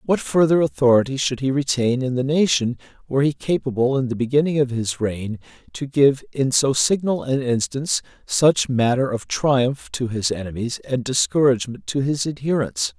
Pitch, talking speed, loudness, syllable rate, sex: 130 Hz, 170 wpm, -20 LUFS, 5.1 syllables/s, male